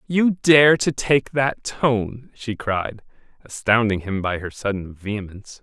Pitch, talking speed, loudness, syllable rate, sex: 115 Hz, 150 wpm, -20 LUFS, 4.0 syllables/s, male